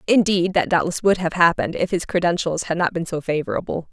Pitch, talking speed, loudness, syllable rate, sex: 175 Hz, 215 wpm, -20 LUFS, 6.2 syllables/s, female